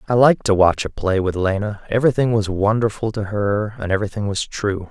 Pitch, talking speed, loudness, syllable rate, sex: 105 Hz, 210 wpm, -19 LUFS, 5.8 syllables/s, male